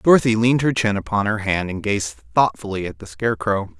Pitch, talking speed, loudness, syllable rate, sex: 105 Hz, 205 wpm, -20 LUFS, 5.8 syllables/s, male